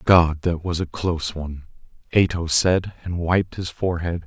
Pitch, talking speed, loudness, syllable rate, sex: 85 Hz, 170 wpm, -22 LUFS, 4.8 syllables/s, male